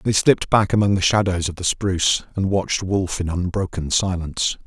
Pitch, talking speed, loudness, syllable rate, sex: 95 Hz, 195 wpm, -20 LUFS, 5.5 syllables/s, male